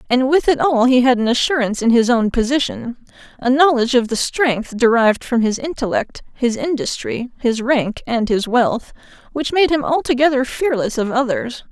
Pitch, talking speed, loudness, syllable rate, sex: 250 Hz, 170 wpm, -17 LUFS, 5.1 syllables/s, female